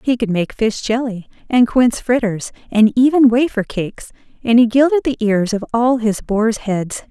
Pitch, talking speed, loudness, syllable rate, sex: 230 Hz, 185 wpm, -16 LUFS, 4.9 syllables/s, female